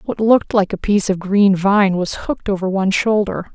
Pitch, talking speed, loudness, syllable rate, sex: 200 Hz, 220 wpm, -16 LUFS, 5.6 syllables/s, female